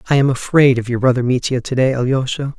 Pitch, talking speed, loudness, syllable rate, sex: 130 Hz, 230 wpm, -16 LUFS, 6.3 syllables/s, male